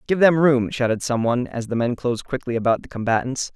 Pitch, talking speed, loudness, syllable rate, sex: 125 Hz, 235 wpm, -21 LUFS, 6.2 syllables/s, male